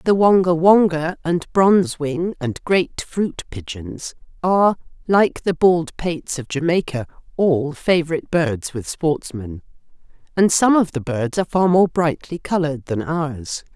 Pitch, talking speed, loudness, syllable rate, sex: 160 Hz, 150 wpm, -19 LUFS, 4.3 syllables/s, female